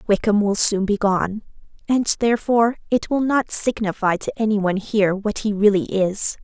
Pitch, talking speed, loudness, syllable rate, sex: 210 Hz, 170 wpm, -19 LUFS, 5.1 syllables/s, female